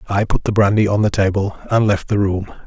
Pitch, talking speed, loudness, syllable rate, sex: 100 Hz, 250 wpm, -17 LUFS, 5.7 syllables/s, male